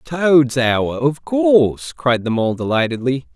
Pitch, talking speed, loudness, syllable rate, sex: 135 Hz, 145 wpm, -17 LUFS, 3.8 syllables/s, male